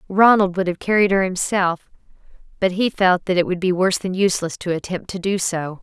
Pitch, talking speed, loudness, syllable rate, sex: 185 Hz, 215 wpm, -19 LUFS, 5.7 syllables/s, female